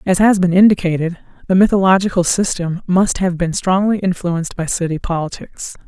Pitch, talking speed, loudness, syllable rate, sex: 180 Hz, 155 wpm, -16 LUFS, 5.4 syllables/s, female